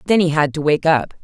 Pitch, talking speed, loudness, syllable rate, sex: 160 Hz, 290 wpm, -17 LUFS, 6.1 syllables/s, female